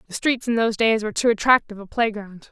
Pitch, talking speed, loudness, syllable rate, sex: 220 Hz, 240 wpm, -20 LUFS, 6.9 syllables/s, female